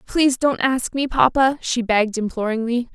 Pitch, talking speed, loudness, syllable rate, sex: 245 Hz, 165 wpm, -19 LUFS, 5.1 syllables/s, female